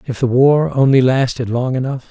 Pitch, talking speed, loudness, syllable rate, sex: 130 Hz, 200 wpm, -15 LUFS, 5.1 syllables/s, male